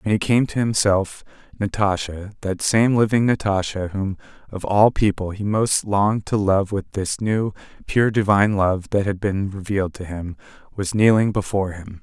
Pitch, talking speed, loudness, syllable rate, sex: 100 Hz, 175 wpm, -20 LUFS, 4.8 syllables/s, male